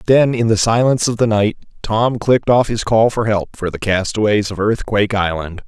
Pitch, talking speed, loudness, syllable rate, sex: 110 Hz, 210 wpm, -16 LUFS, 5.3 syllables/s, male